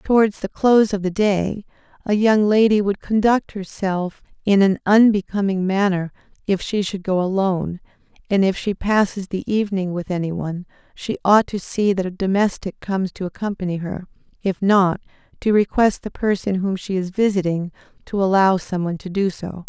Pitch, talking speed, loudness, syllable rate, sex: 195 Hz, 175 wpm, -20 LUFS, 5.1 syllables/s, female